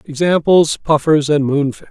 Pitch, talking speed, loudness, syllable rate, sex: 150 Hz, 125 wpm, -14 LUFS, 4.7 syllables/s, male